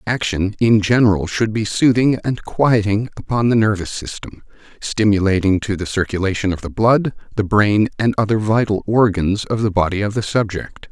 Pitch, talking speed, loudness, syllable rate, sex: 105 Hz, 175 wpm, -17 LUFS, 5.1 syllables/s, male